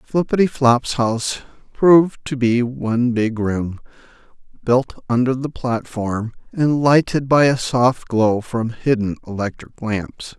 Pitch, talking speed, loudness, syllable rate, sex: 125 Hz, 125 wpm, -18 LUFS, 3.9 syllables/s, male